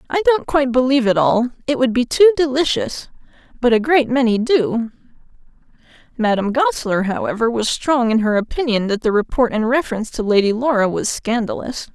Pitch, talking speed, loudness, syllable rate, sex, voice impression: 245 Hz, 165 wpm, -17 LUFS, 5.7 syllables/s, female, very feminine, very adult-like, slightly middle-aged, thin, very tensed, very powerful, very bright, very hard, very clear, very fluent, slightly raspy, cool, very intellectual, refreshing, very sincere, calm, slightly friendly, reassuring, very unique, very elegant, very lively, very strict, very intense, very sharp